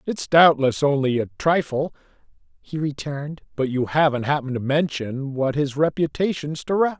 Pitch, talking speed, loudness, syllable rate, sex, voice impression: 150 Hz, 165 wpm, -22 LUFS, 5.2 syllables/s, female, feminine, tensed, slightly bright, clear, slightly unique, slightly lively